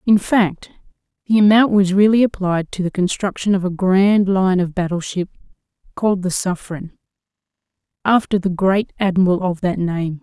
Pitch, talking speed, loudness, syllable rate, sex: 190 Hz, 160 wpm, -17 LUFS, 4.9 syllables/s, female